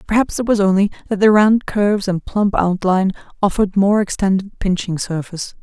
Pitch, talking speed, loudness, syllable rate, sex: 200 Hz, 170 wpm, -17 LUFS, 5.8 syllables/s, female